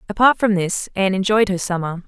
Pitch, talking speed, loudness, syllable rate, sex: 195 Hz, 200 wpm, -18 LUFS, 6.0 syllables/s, female